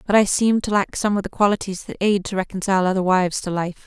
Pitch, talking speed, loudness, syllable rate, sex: 195 Hz, 265 wpm, -20 LUFS, 6.9 syllables/s, female